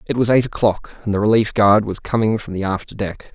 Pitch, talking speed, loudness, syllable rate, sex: 105 Hz, 250 wpm, -18 LUFS, 5.8 syllables/s, male